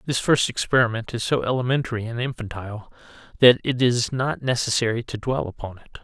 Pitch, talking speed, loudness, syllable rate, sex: 120 Hz, 170 wpm, -22 LUFS, 5.9 syllables/s, male